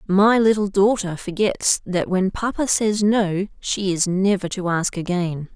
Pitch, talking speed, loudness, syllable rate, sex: 195 Hz, 160 wpm, -20 LUFS, 4.0 syllables/s, female